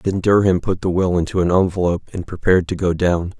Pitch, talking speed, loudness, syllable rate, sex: 90 Hz, 230 wpm, -18 LUFS, 6.2 syllables/s, male